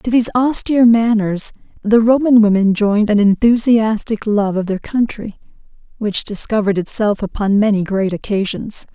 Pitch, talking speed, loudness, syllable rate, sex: 215 Hz, 140 wpm, -15 LUFS, 5.1 syllables/s, female